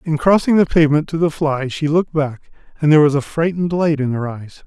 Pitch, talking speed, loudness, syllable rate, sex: 155 Hz, 245 wpm, -17 LUFS, 6.1 syllables/s, male